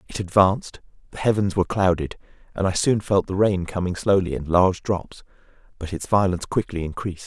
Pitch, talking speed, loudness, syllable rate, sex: 95 Hz, 180 wpm, -22 LUFS, 5.9 syllables/s, male